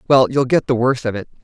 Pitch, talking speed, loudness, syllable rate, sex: 125 Hz, 250 wpm, -17 LUFS, 6.2 syllables/s, female